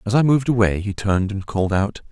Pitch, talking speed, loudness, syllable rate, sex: 105 Hz, 255 wpm, -20 LUFS, 6.7 syllables/s, male